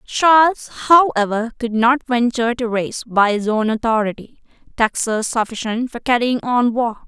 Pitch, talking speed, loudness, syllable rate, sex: 235 Hz, 145 wpm, -17 LUFS, 4.7 syllables/s, female